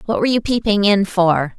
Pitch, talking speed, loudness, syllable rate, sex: 200 Hz, 230 wpm, -16 LUFS, 5.6 syllables/s, female